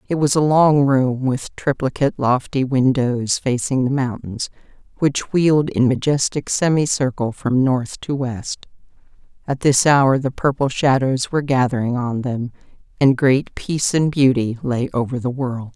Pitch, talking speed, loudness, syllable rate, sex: 130 Hz, 150 wpm, -18 LUFS, 4.5 syllables/s, female